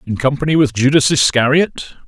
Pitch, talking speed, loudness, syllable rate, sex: 135 Hz, 145 wpm, -14 LUFS, 5.4 syllables/s, male